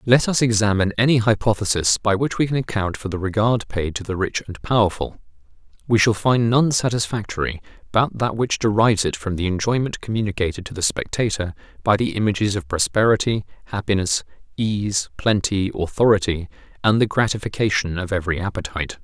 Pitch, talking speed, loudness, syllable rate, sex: 105 Hz, 160 wpm, -21 LUFS, 5.9 syllables/s, male